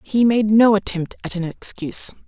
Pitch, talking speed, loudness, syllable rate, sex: 205 Hz, 185 wpm, -18 LUFS, 5.0 syllables/s, female